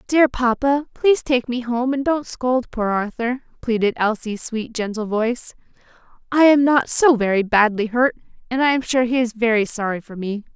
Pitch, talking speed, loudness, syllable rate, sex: 240 Hz, 190 wpm, -19 LUFS, 4.9 syllables/s, female